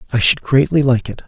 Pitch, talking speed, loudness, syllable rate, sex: 125 Hz, 235 wpm, -15 LUFS, 6.1 syllables/s, male